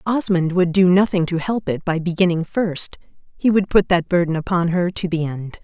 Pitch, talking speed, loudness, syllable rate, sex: 175 Hz, 215 wpm, -19 LUFS, 5.1 syllables/s, female